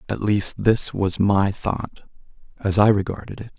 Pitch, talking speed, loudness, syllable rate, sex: 100 Hz, 165 wpm, -21 LUFS, 4.1 syllables/s, male